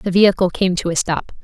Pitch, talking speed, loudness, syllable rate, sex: 185 Hz, 250 wpm, -17 LUFS, 6.1 syllables/s, female